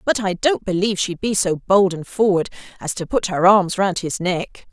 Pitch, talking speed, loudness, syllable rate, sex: 190 Hz, 230 wpm, -19 LUFS, 4.9 syllables/s, female